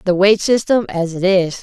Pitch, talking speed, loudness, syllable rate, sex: 190 Hz, 220 wpm, -15 LUFS, 4.9 syllables/s, female